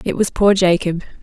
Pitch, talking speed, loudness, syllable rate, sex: 185 Hz, 195 wpm, -16 LUFS, 5.2 syllables/s, female